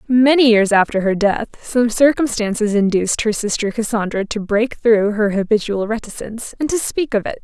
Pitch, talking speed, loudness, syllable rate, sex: 220 Hz, 180 wpm, -17 LUFS, 5.1 syllables/s, female